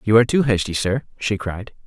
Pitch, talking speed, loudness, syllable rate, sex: 105 Hz, 225 wpm, -20 LUFS, 5.8 syllables/s, male